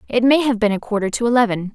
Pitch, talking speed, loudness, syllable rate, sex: 225 Hz, 275 wpm, -17 LUFS, 7.0 syllables/s, female